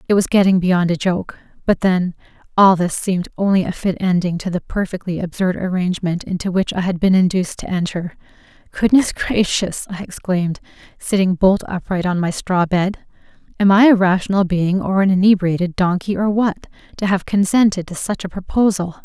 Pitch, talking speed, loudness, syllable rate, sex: 185 Hz, 180 wpm, -17 LUFS, 5.4 syllables/s, female